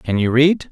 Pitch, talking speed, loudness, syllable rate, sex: 135 Hz, 250 wpm, -15 LUFS, 4.5 syllables/s, male